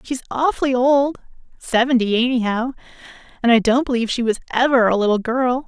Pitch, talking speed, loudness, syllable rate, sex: 245 Hz, 135 wpm, -18 LUFS, 5.9 syllables/s, female